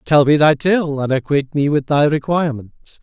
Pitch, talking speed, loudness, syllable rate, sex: 145 Hz, 200 wpm, -16 LUFS, 4.8 syllables/s, male